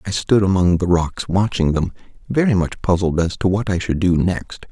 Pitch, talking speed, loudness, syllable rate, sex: 90 Hz, 215 wpm, -18 LUFS, 5.1 syllables/s, male